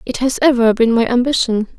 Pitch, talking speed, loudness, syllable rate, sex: 240 Hz, 200 wpm, -14 LUFS, 5.7 syllables/s, female